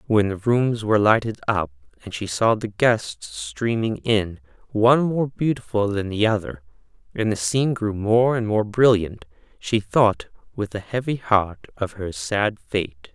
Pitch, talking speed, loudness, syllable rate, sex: 105 Hz, 170 wpm, -22 LUFS, 4.2 syllables/s, male